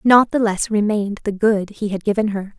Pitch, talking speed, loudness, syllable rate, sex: 210 Hz, 230 wpm, -19 LUFS, 5.4 syllables/s, female